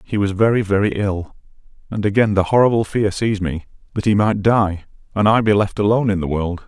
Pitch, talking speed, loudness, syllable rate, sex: 100 Hz, 215 wpm, -18 LUFS, 5.9 syllables/s, male